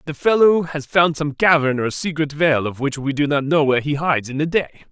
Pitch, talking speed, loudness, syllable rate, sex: 150 Hz, 255 wpm, -18 LUFS, 5.7 syllables/s, male